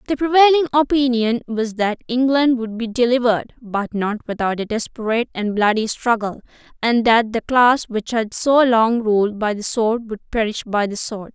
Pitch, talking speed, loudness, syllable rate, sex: 230 Hz, 180 wpm, -18 LUFS, 4.7 syllables/s, female